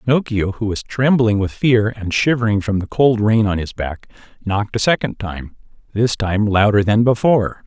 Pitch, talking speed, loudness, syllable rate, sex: 110 Hz, 190 wpm, -17 LUFS, 5.0 syllables/s, male